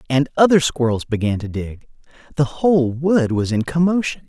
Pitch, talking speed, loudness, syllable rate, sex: 140 Hz, 155 wpm, -18 LUFS, 5.0 syllables/s, male